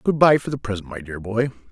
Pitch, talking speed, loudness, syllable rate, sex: 115 Hz, 280 wpm, -22 LUFS, 6.2 syllables/s, male